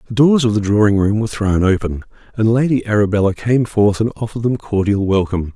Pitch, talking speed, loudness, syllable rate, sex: 105 Hz, 205 wpm, -16 LUFS, 6.2 syllables/s, male